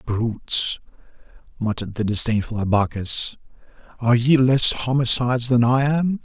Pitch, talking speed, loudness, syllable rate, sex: 120 Hz, 115 wpm, -20 LUFS, 4.9 syllables/s, male